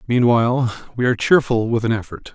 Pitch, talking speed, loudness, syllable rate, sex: 120 Hz, 180 wpm, -18 LUFS, 6.2 syllables/s, male